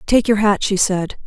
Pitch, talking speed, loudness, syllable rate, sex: 205 Hz, 235 wpm, -17 LUFS, 4.6 syllables/s, female